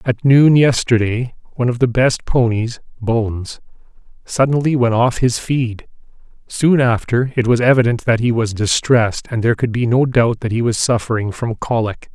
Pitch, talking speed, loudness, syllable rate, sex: 120 Hz, 170 wpm, -16 LUFS, 4.9 syllables/s, male